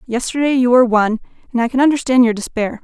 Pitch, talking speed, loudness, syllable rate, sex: 245 Hz, 210 wpm, -15 LUFS, 7.1 syllables/s, female